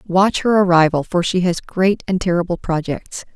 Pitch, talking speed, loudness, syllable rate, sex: 180 Hz, 180 wpm, -17 LUFS, 4.8 syllables/s, female